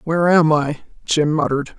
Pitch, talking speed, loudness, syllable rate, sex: 155 Hz, 170 wpm, -17 LUFS, 5.6 syllables/s, female